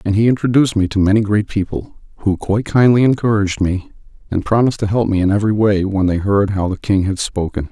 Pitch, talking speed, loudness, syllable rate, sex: 100 Hz, 225 wpm, -16 LUFS, 6.3 syllables/s, male